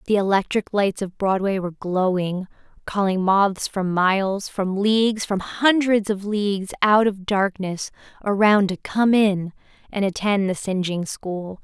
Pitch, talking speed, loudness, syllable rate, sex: 195 Hz, 145 wpm, -21 LUFS, 4.2 syllables/s, female